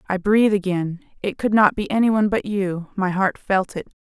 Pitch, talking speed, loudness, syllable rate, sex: 200 Hz, 210 wpm, -20 LUFS, 5.2 syllables/s, female